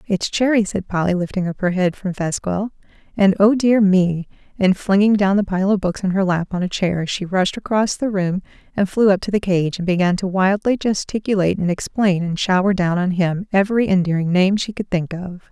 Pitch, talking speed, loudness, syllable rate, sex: 190 Hz, 215 wpm, -18 LUFS, 5.4 syllables/s, female